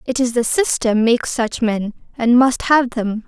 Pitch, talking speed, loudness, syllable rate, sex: 240 Hz, 185 wpm, -17 LUFS, 4.5 syllables/s, female